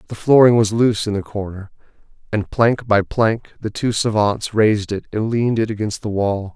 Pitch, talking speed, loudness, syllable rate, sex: 110 Hz, 200 wpm, -18 LUFS, 5.2 syllables/s, male